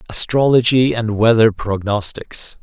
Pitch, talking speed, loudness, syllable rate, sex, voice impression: 110 Hz, 90 wpm, -16 LUFS, 4.1 syllables/s, male, masculine, adult-like, tensed, slightly bright, soft, slightly raspy, cool, intellectual, calm, slightly friendly, reassuring, wild, slightly lively, slightly kind